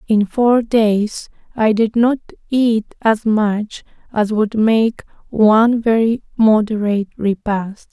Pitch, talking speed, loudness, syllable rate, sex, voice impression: 220 Hz, 120 wpm, -16 LUFS, 3.4 syllables/s, female, feminine, adult-like, relaxed, weak, soft, halting, calm, reassuring, elegant, kind, modest